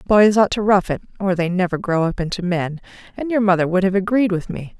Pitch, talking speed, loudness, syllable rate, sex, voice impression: 190 Hz, 250 wpm, -18 LUFS, 5.9 syllables/s, female, very feminine, adult-like, slightly middle-aged, very thin, slightly relaxed, slightly weak, slightly dark, slightly hard, clear, slightly fluent, slightly cute, intellectual, slightly refreshing, sincere, slightly calm, reassuring, very elegant, slightly wild, sweet, slightly lively, very kind, modest